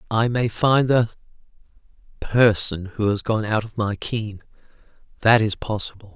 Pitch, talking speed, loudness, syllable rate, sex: 110 Hz, 135 wpm, -21 LUFS, 4.4 syllables/s, male